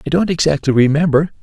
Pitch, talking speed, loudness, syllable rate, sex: 155 Hz, 170 wpm, -14 LUFS, 6.5 syllables/s, male